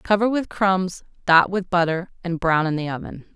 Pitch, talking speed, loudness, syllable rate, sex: 180 Hz, 195 wpm, -21 LUFS, 4.9 syllables/s, female